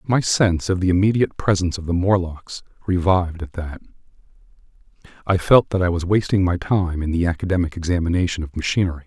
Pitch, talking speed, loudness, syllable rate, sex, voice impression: 90 Hz, 170 wpm, -20 LUFS, 6.3 syllables/s, male, very masculine, slightly old, very thick, slightly tensed, slightly relaxed, powerful, bright, soft, very clear, fluent, slightly raspy, cool, very intellectual, refreshing, very sincere, very calm, very mature, very friendly, very reassuring, unique, elegant, slightly wild, slightly lively, kind